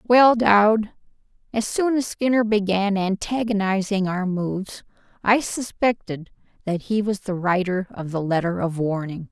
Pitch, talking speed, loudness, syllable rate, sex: 200 Hz, 140 wpm, -22 LUFS, 4.3 syllables/s, female